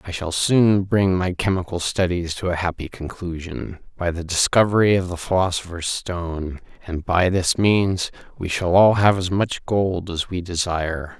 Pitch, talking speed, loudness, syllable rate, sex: 90 Hz, 170 wpm, -21 LUFS, 4.5 syllables/s, male